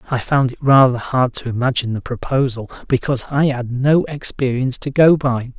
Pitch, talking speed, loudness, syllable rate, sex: 130 Hz, 185 wpm, -17 LUFS, 5.5 syllables/s, male